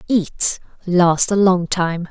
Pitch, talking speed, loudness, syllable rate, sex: 180 Hz, 145 wpm, -17 LUFS, 3.0 syllables/s, female